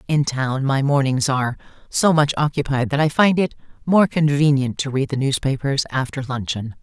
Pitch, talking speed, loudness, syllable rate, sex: 140 Hz, 175 wpm, -19 LUFS, 5.0 syllables/s, female